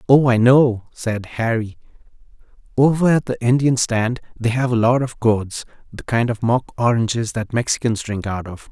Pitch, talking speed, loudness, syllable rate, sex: 120 Hz, 180 wpm, -19 LUFS, 4.7 syllables/s, male